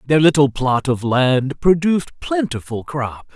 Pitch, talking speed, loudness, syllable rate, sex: 140 Hz, 145 wpm, -18 LUFS, 4.1 syllables/s, male